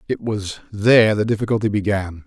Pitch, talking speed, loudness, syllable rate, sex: 105 Hz, 160 wpm, -18 LUFS, 5.7 syllables/s, male